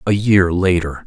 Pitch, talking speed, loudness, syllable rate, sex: 90 Hz, 170 wpm, -15 LUFS, 4.2 syllables/s, male